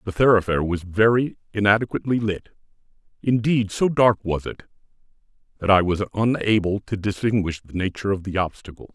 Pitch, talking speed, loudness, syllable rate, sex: 100 Hz, 150 wpm, -22 LUFS, 5.8 syllables/s, male